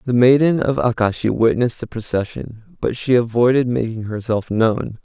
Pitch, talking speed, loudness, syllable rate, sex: 120 Hz, 155 wpm, -18 LUFS, 5.1 syllables/s, male